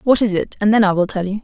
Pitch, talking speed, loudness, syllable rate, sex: 205 Hz, 375 wpm, -16 LUFS, 7.0 syllables/s, female